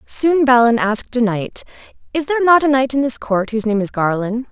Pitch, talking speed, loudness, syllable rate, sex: 245 Hz, 225 wpm, -16 LUFS, 5.7 syllables/s, female